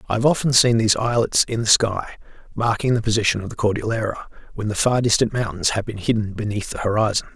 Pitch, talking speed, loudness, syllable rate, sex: 110 Hz, 210 wpm, -20 LUFS, 6.4 syllables/s, male